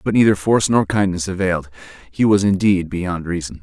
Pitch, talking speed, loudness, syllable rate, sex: 95 Hz, 180 wpm, -18 LUFS, 5.7 syllables/s, male